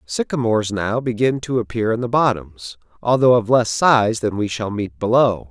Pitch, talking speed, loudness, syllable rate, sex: 110 Hz, 185 wpm, -18 LUFS, 4.8 syllables/s, male